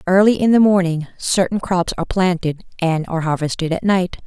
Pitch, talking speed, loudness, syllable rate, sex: 180 Hz, 185 wpm, -18 LUFS, 5.4 syllables/s, female